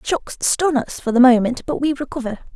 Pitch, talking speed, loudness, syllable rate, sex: 260 Hz, 210 wpm, -18 LUFS, 5.3 syllables/s, female